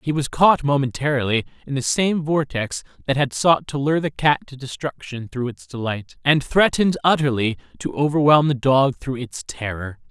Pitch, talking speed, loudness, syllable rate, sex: 135 Hz, 180 wpm, -20 LUFS, 5.0 syllables/s, male